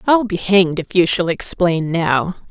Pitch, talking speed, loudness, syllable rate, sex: 180 Hz, 190 wpm, -16 LUFS, 4.4 syllables/s, female